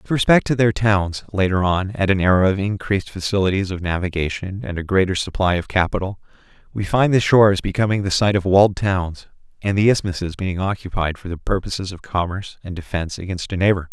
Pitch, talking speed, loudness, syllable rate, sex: 95 Hz, 200 wpm, -20 LUFS, 6.0 syllables/s, male